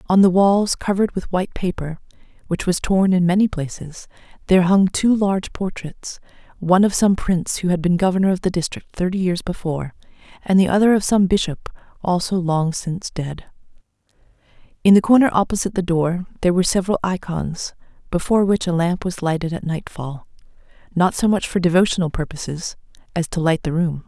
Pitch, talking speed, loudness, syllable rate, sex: 180 Hz, 175 wpm, -19 LUFS, 5.8 syllables/s, female